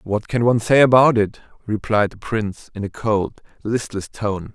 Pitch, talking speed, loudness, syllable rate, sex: 110 Hz, 185 wpm, -19 LUFS, 4.8 syllables/s, male